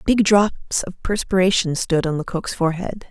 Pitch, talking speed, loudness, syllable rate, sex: 185 Hz, 155 wpm, -20 LUFS, 4.7 syllables/s, female